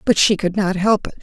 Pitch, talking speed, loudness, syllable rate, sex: 195 Hz, 295 wpm, -17 LUFS, 5.7 syllables/s, female